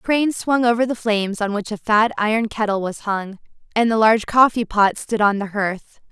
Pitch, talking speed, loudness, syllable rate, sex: 215 Hz, 225 wpm, -19 LUFS, 5.4 syllables/s, female